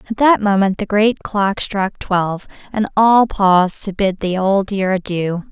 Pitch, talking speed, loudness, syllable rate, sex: 200 Hz, 185 wpm, -16 LUFS, 4.2 syllables/s, female